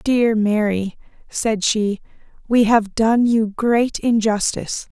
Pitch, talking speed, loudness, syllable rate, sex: 220 Hz, 120 wpm, -18 LUFS, 3.4 syllables/s, female